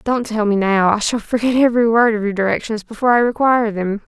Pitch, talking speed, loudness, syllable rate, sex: 220 Hz, 230 wpm, -16 LUFS, 6.3 syllables/s, female